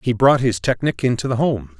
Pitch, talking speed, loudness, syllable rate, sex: 120 Hz, 235 wpm, -18 LUFS, 5.4 syllables/s, male